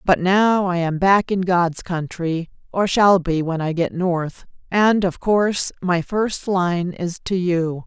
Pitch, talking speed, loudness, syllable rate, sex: 180 Hz, 185 wpm, -19 LUFS, 3.6 syllables/s, female